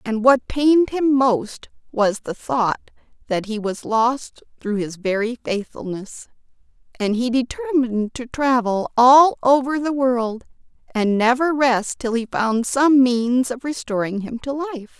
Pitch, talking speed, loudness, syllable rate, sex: 245 Hz, 150 wpm, -19 LUFS, 4.0 syllables/s, female